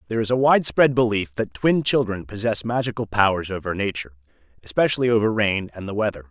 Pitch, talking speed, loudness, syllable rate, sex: 105 Hz, 180 wpm, -21 LUFS, 6.6 syllables/s, male